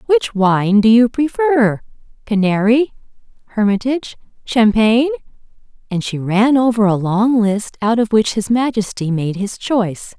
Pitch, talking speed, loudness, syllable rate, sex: 225 Hz, 130 wpm, -15 LUFS, 4.2 syllables/s, female